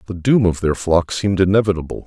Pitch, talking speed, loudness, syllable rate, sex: 95 Hz, 205 wpm, -17 LUFS, 6.4 syllables/s, male